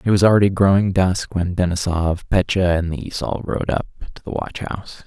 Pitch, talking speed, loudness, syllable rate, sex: 90 Hz, 190 wpm, -19 LUFS, 5.4 syllables/s, male